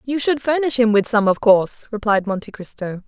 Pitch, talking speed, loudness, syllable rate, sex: 225 Hz, 215 wpm, -18 LUFS, 5.5 syllables/s, female